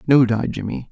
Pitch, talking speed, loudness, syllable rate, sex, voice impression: 120 Hz, 195 wpm, -19 LUFS, 5.3 syllables/s, male, masculine, very adult-like, slightly thick, slightly dark, slightly muffled, very calm, slightly reassuring, kind